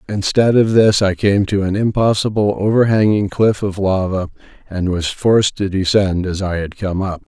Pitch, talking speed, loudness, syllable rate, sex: 100 Hz, 180 wpm, -16 LUFS, 4.8 syllables/s, male